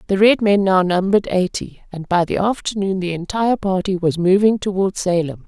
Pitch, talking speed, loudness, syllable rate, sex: 190 Hz, 185 wpm, -18 LUFS, 5.5 syllables/s, female